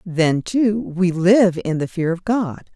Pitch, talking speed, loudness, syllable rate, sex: 185 Hz, 195 wpm, -19 LUFS, 3.5 syllables/s, female